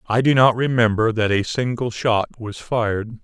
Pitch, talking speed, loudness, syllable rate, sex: 115 Hz, 185 wpm, -19 LUFS, 4.9 syllables/s, male